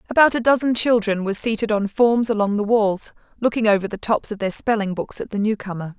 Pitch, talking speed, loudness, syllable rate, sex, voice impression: 215 Hz, 220 wpm, -20 LUFS, 6.0 syllables/s, female, feminine, adult-like, tensed, powerful, bright, clear, friendly, elegant, lively, intense, slightly sharp